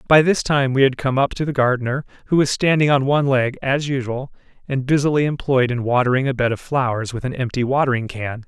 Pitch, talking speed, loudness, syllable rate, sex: 130 Hz, 225 wpm, -19 LUFS, 6.0 syllables/s, male